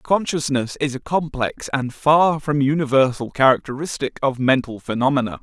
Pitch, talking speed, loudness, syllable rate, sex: 140 Hz, 135 wpm, -20 LUFS, 4.9 syllables/s, male